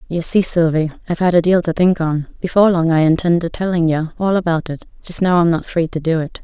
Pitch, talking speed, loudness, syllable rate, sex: 170 Hz, 250 wpm, -16 LUFS, 5.9 syllables/s, female